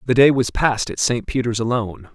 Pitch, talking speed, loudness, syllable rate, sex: 120 Hz, 225 wpm, -19 LUFS, 6.1 syllables/s, male